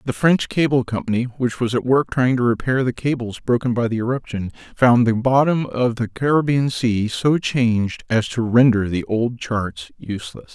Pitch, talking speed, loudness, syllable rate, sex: 120 Hz, 190 wpm, -19 LUFS, 4.8 syllables/s, male